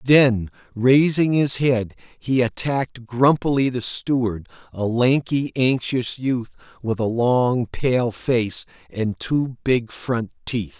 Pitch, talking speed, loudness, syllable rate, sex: 125 Hz, 130 wpm, -21 LUFS, 3.3 syllables/s, male